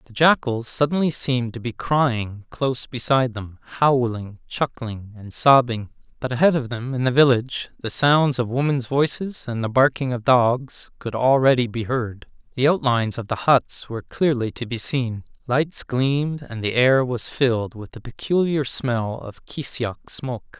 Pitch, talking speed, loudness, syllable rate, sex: 125 Hz, 170 wpm, -21 LUFS, 4.6 syllables/s, male